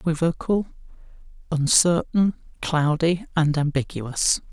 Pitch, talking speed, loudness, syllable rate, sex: 160 Hz, 65 wpm, -22 LUFS, 3.9 syllables/s, male